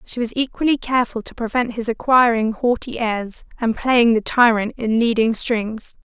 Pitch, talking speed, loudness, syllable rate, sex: 230 Hz, 170 wpm, -19 LUFS, 4.8 syllables/s, female